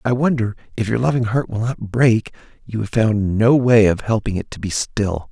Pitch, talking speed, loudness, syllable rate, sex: 110 Hz, 225 wpm, -18 LUFS, 4.9 syllables/s, male